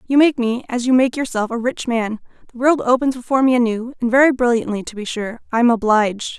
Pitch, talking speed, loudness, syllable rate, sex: 240 Hz, 225 wpm, -18 LUFS, 6.2 syllables/s, female